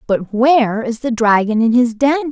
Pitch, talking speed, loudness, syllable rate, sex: 240 Hz, 210 wpm, -15 LUFS, 4.9 syllables/s, female